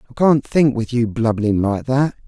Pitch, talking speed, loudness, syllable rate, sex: 125 Hz, 210 wpm, -18 LUFS, 4.6 syllables/s, male